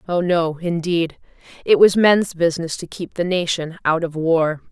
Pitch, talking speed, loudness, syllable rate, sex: 170 Hz, 180 wpm, -19 LUFS, 4.6 syllables/s, female